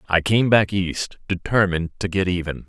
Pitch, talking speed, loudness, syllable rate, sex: 95 Hz, 180 wpm, -21 LUFS, 5.1 syllables/s, male